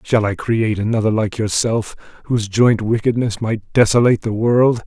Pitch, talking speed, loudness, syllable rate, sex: 110 Hz, 160 wpm, -17 LUFS, 5.2 syllables/s, male